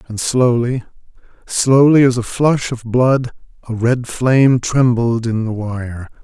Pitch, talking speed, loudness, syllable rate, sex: 120 Hz, 145 wpm, -15 LUFS, 3.9 syllables/s, male